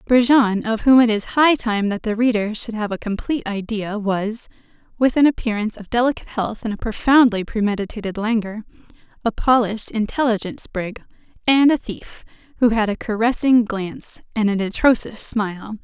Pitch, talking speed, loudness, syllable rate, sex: 220 Hz, 165 wpm, -19 LUFS, 5.4 syllables/s, female